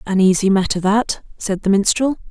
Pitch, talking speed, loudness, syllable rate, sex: 205 Hz, 180 wpm, -17 LUFS, 5.1 syllables/s, female